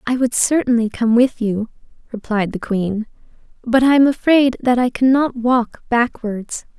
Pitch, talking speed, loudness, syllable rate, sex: 240 Hz, 160 wpm, -17 LUFS, 4.3 syllables/s, female